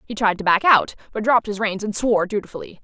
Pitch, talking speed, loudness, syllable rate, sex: 210 Hz, 255 wpm, -19 LUFS, 6.9 syllables/s, female